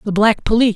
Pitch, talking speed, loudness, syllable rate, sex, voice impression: 215 Hz, 240 wpm, -15 LUFS, 7.4 syllables/s, male, masculine, slightly feminine, gender-neutral, slightly young, slightly adult-like, slightly thick, slightly tensed, powerful, slightly dark, hard, slightly muffled, fluent, slightly cool, intellectual, refreshing, very sincere, very calm, slightly mature, slightly friendly, slightly reassuring, very unique, slightly elegant, slightly sweet, kind, sharp, slightly modest